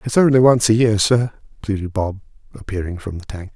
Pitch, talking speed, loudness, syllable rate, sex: 105 Hz, 200 wpm, -18 LUFS, 5.6 syllables/s, male